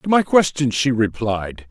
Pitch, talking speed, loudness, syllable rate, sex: 125 Hz, 175 wpm, -18 LUFS, 4.6 syllables/s, male